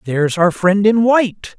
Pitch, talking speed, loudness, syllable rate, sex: 200 Hz, 190 wpm, -14 LUFS, 4.8 syllables/s, male